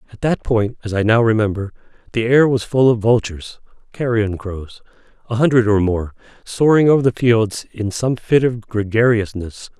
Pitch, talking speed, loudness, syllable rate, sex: 115 Hz, 170 wpm, -17 LUFS, 5.0 syllables/s, male